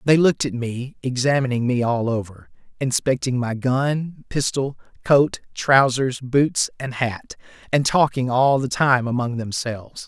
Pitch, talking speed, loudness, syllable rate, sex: 130 Hz, 145 wpm, -21 LUFS, 4.2 syllables/s, male